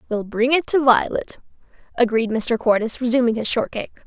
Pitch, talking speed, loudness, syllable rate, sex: 235 Hz, 160 wpm, -19 LUFS, 6.0 syllables/s, female